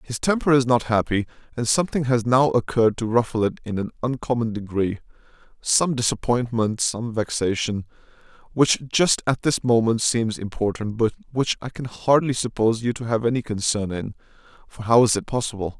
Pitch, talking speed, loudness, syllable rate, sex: 115 Hz, 170 wpm, -22 LUFS, 5.4 syllables/s, male